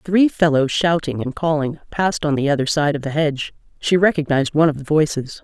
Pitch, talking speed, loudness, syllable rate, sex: 150 Hz, 210 wpm, -19 LUFS, 6.0 syllables/s, female